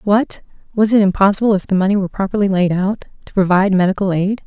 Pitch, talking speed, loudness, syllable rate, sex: 195 Hz, 200 wpm, -16 LUFS, 6.7 syllables/s, female